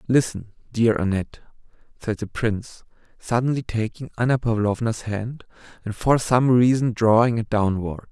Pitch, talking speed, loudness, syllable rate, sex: 115 Hz, 135 wpm, -22 LUFS, 4.9 syllables/s, male